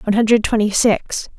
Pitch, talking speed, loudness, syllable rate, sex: 220 Hz, 175 wpm, -16 LUFS, 8.0 syllables/s, female